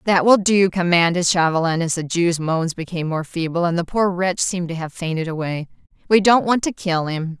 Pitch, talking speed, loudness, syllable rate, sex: 175 Hz, 220 wpm, -19 LUFS, 5.4 syllables/s, female